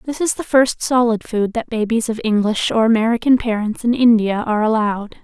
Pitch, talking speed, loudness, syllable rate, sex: 225 Hz, 195 wpm, -17 LUFS, 5.6 syllables/s, female